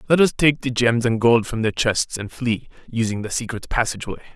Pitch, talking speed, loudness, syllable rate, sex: 120 Hz, 220 wpm, -21 LUFS, 5.5 syllables/s, male